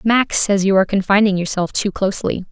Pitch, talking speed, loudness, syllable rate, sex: 195 Hz, 190 wpm, -16 LUFS, 5.9 syllables/s, female